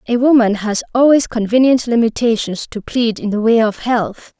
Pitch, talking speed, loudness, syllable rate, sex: 230 Hz, 180 wpm, -15 LUFS, 4.9 syllables/s, female